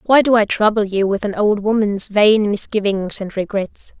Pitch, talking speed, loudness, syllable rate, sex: 205 Hz, 195 wpm, -17 LUFS, 4.6 syllables/s, female